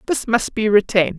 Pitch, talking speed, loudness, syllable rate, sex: 215 Hz, 200 wpm, -17 LUFS, 5.8 syllables/s, female